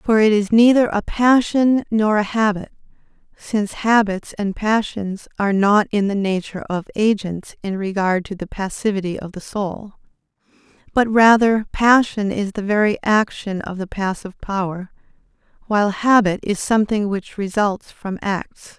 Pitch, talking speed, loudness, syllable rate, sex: 205 Hz, 150 wpm, -19 LUFS, 4.6 syllables/s, female